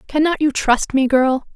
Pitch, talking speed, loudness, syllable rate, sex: 275 Hz, 195 wpm, -17 LUFS, 4.4 syllables/s, female